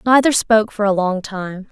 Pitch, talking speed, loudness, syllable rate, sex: 210 Hz, 210 wpm, -17 LUFS, 5.0 syllables/s, female